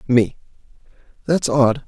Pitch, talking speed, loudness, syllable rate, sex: 130 Hz, 95 wpm, -18 LUFS, 3.8 syllables/s, male